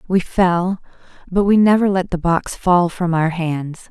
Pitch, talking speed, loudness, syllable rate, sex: 180 Hz, 185 wpm, -17 LUFS, 4.0 syllables/s, female